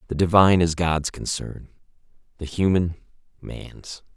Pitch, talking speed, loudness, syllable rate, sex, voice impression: 85 Hz, 115 wpm, -21 LUFS, 4.4 syllables/s, male, very masculine, very adult-like, middle-aged, very thick, slightly relaxed, very powerful, slightly dark, slightly soft, muffled, fluent, very cool, very intellectual, slightly refreshing, very sincere, very calm, very mature, friendly, very reassuring, very unique, elegant, wild, sweet, slightly lively, very kind, slightly modest